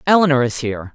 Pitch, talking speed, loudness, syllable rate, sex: 140 Hz, 190 wpm, -17 LUFS, 7.4 syllables/s, female